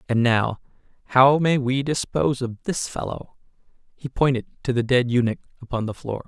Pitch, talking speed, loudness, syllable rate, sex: 125 Hz, 170 wpm, -22 LUFS, 5.2 syllables/s, male